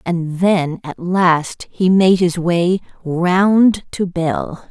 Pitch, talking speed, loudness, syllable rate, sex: 175 Hz, 140 wpm, -16 LUFS, 2.6 syllables/s, female